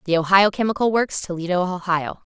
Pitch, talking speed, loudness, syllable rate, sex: 190 Hz, 155 wpm, -20 LUFS, 5.7 syllables/s, female